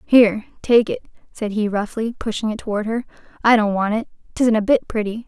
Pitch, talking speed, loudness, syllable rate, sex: 225 Hz, 205 wpm, -20 LUFS, 5.8 syllables/s, female